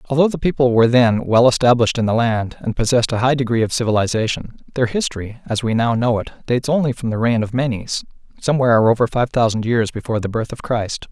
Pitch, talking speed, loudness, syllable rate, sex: 120 Hz, 220 wpm, -18 LUFS, 6.5 syllables/s, male